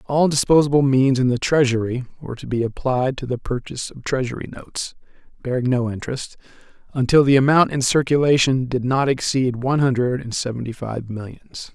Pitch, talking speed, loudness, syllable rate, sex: 130 Hz, 170 wpm, -20 LUFS, 5.7 syllables/s, male